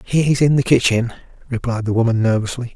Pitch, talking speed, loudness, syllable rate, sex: 120 Hz, 175 wpm, -17 LUFS, 5.7 syllables/s, male